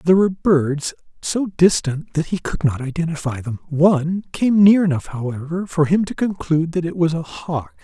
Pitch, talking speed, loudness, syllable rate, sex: 165 Hz, 190 wpm, -19 LUFS, 5.1 syllables/s, male